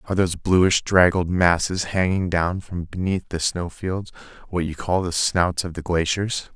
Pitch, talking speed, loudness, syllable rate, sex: 90 Hz, 185 wpm, -22 LUFS, 4.5 syllables/s, male